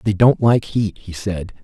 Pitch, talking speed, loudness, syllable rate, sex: 100 Hz, 220 wpm, -18 LUFS, 4.2 syllables/s, male